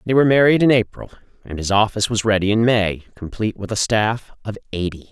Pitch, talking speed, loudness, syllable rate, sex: 105 Hz, 210 wpm, -18 LUFS, 6.4 syllables/s, male